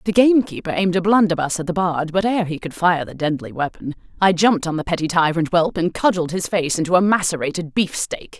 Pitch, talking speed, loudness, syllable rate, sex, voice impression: 175 Hz, 220 wpm, -19 LUFS, 6.1 syllables/s, female, feminine, very adult-like, fluent, slightly intellectual, calm